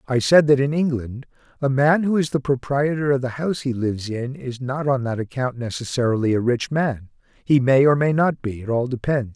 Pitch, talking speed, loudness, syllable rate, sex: 130 Hz, 225 wpm, -21 LUFS, 5.3 syllables/s, male